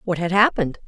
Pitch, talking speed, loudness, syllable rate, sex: 185 Hz, 205 wpm, -19 LUFS, 7.0 syllables/s, female